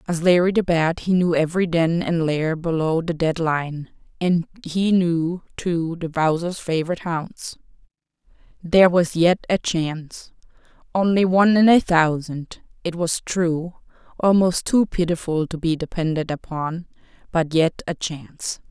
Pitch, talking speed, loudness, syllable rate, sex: 170 Hz, 145 wpm, -21 LUFS, 4.4 syllables/s, female